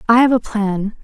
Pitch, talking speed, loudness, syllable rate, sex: 220 Hz, 235 wpm, -16 LUFS, 4.8 syllables/s, female